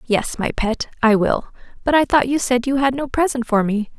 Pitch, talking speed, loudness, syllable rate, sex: 250 Hz, 240 wpm, -19 LUFS, 5.0 syllables/s, female